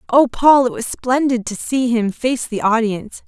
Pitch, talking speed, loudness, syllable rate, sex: 240 Hz, 200 wpm, -17 LUFS, 4.6 syllables/s, female